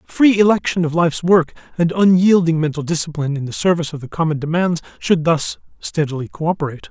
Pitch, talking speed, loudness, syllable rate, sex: 165 Hz, 175 wpm, -17 LUFS, 6.1 syllables/s, male